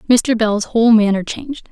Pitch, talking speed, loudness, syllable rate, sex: 230 Hz, 175 wpm, -15 LUFS, 5.3 syllables/s, female